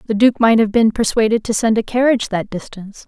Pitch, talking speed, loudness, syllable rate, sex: 220 Hz, 235 wpm, -15 LUFS, 6.2 syllables/s, female